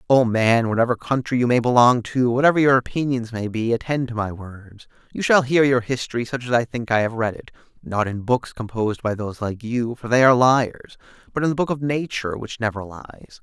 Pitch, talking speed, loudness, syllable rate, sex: 120 Hz, 230 wpm, -20 LUFS, 5.6 syllables/s, male